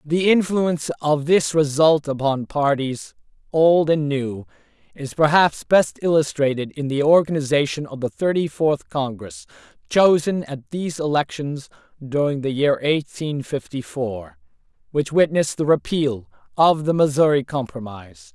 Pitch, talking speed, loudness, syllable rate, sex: 145 Hz, 130 wpm, -20 LUFS, 4.4 syllables/s, male